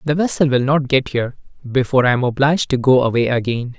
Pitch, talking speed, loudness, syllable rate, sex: 130 Hz, 220 wpm, -17 LUFS, 6.5 syllables/s, male